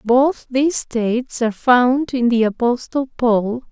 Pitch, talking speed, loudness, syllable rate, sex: 245 Hz, 145 wpm, -18 LUFS, 4.1 syllables/s, female